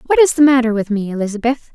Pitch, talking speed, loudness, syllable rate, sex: 245 Hz, 240 wpm, -15 LUFS, 7.0 syllables/s, female